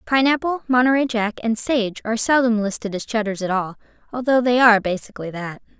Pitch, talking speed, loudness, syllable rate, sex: 230 Hz, 175 wpm, -20 LUFS, 5.9 syllables/s, female